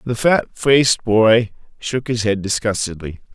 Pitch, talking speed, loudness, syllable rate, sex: 110 Hz, 145 wpm, -17 LUFS, 4.3 syllables/s, male